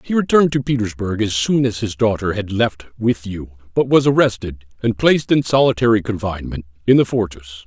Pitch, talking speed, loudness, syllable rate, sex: 110 Hz, 190 wpm, -18 LUFS, 5.7 syllables/s, male